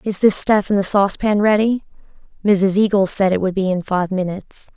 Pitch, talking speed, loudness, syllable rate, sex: 195 Hz, 200 wpm, -17 LUFS, 5.5 syllables/s, female